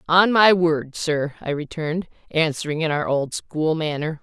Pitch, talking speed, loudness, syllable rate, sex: 160 Hz, 170 wpm, -21 LUFS, 4.5 syllables/s, female